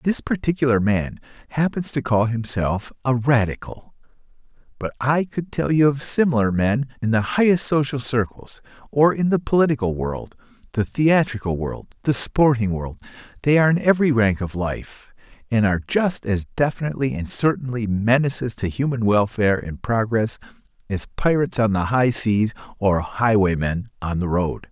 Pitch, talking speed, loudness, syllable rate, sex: 120 Hz, 155 wpm, -21 LUFS, 5.0 syllables/s, male